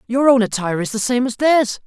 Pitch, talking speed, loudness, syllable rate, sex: 240 Hz, 255 wpm, -17 LUFS, 6.0 syllables/s, male